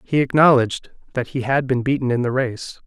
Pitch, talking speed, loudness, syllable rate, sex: 130 Hz, 210 wpm, -19 LUFS, 5.6 syllables/s, male